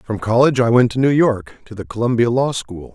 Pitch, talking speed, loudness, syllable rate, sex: 115 Hz, 245 wpm, -16 LUFS, 5.7 syllables/s, male